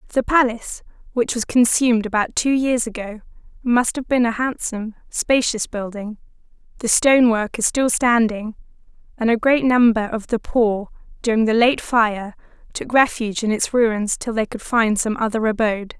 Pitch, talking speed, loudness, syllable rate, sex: 230 Hz, 170 wpm, -19 LUFS, 5.0 syllables/s, female